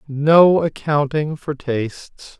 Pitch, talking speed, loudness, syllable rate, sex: 145 Hz, 100 wpm, -17 LUFS, 3.1 syllables/s, male